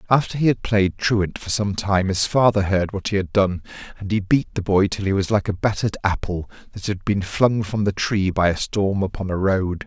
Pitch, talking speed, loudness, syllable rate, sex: 100 Hz, 245 wpm, -21 LUFS, 5.2 syllables/s, male